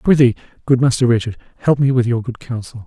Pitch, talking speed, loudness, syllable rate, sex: 120 Hz, 210 wpm, -17 LUFS, 6.2 syllables/s, male